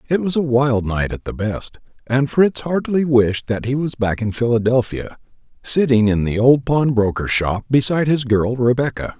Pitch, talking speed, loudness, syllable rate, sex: 125 Hz, 185 wpm, -18 LUFS, 4.8 syllables/s, male